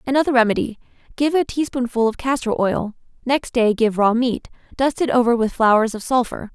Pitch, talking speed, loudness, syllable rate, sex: 250 Hz, 175 wpm, -19 LUFS, 5.5 syllables/s, female